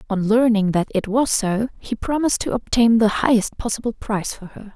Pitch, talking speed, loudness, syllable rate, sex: 220 Hz, 200 wpm, -20 LUFS, 5.4 syllables/s, female